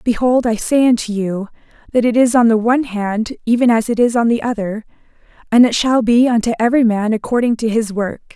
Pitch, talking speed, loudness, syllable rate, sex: 230 Hz, 215 wpm, -15 LUFS, 5.8 syllables/s, female